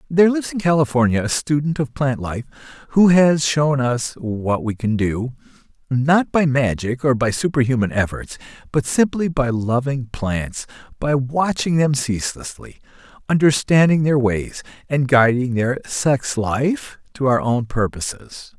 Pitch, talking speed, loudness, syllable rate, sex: 135 Hz, 145 wpm, -19 LUFS, 4.3 syllables/s, male